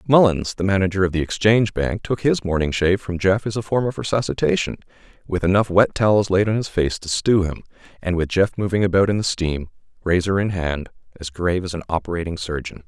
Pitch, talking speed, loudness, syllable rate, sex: 95 Hz, 215 wpm, -20 LUFS, 6.0 syllables/s, male